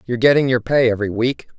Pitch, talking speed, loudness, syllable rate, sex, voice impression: 120 Hz, 225 wpm, -17 LUFS, 7.1 syllables/s, male, masculine, adult-like, slightly fluent, refreshing, slightly sincere